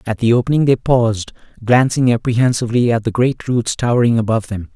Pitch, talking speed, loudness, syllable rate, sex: 115 Hz, 175 wpm, -16 LUFS, 6.3 syllables/s, male